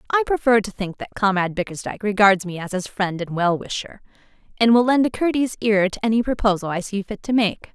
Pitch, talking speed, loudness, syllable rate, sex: 210 Hz, 225 wpm, -21 LUFS, 6.3 syllables/s, female